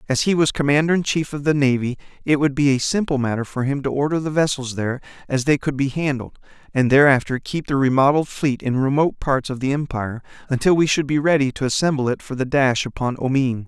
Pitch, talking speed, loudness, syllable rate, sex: 140 Hz, 230 wpm, -20 LUFS, 6.2 syllables/s, male